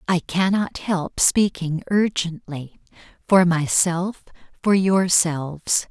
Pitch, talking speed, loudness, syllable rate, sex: 175 Hz, 90 wpm, -20 LUFS, 3.4 syllables/s, female